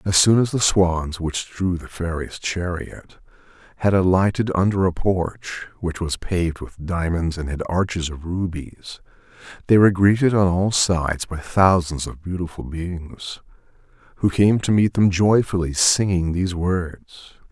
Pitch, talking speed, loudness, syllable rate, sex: 90 Hz, 155 wpm, -20 LUFS, 4.4 syllables/s, male